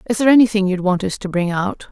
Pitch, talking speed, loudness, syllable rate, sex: 200 Hz, 280 wpm, -17 LUFS, 6.7 syllables/s, female